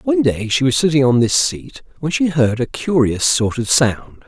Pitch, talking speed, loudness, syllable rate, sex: 130 Hz, 225 wpm, -16 LUFS, 4.8 syllables/s, male